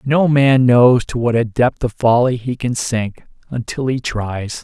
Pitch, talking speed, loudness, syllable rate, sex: 120 Hz, 195 wpm, -16 LUFS, 4.0 syllables/s, male